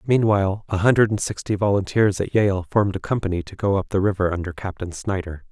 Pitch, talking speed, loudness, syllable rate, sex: 100 Hz, 205 wpm, -21 LUFS, 6.0 syllables/s, male